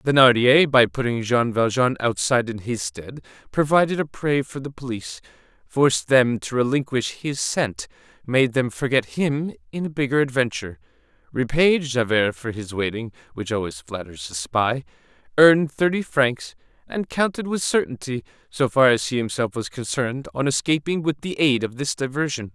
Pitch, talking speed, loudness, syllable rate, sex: 130 Hz, 160 wpm, -22 LUFS, 5.0 syllables/s, male